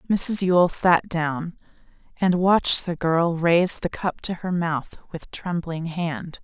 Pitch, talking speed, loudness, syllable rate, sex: 170 Hz, 160 wpm, -21 LUFS, 3.6 syllables/s, female